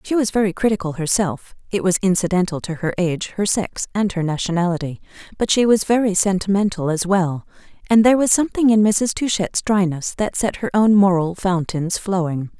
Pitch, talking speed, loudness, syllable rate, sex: 190 Hz, 175 wpm, -19 LUFS, 5.5 syllables/s, female